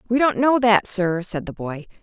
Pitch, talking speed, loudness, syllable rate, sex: 210 Hz, 235 wpm, -20 LUFS, 4.7 syllables/s, female